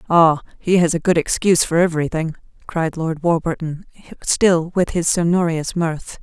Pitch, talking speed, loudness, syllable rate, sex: 165 Hz, 155 wpm, -18 LUFS, 4.8 syllables/s, female